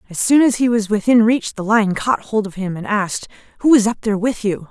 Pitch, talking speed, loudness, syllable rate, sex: 215 Hz, 270 wpm, -17 LUFS, 5.7 syllables/s, female